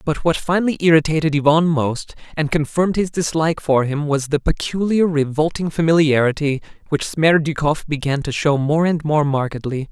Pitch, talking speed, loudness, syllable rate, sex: 155 Hz, 155 wpm, -18 LUFS, 5.3 syllables/s, male